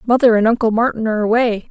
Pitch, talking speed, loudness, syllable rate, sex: 225 Hz, 210 wpm, -15 LUFS, 7.0 syllables/s, female